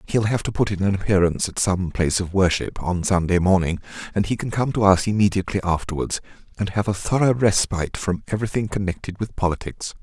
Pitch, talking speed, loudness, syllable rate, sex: 95 Hz, 195 wpm, -22 LUFS, 6.2 syllables/s, male